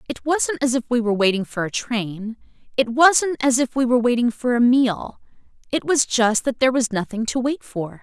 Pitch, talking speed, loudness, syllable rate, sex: 240 Hz, 215 wpm, -20 LUFS, 5.2 syllables/s, female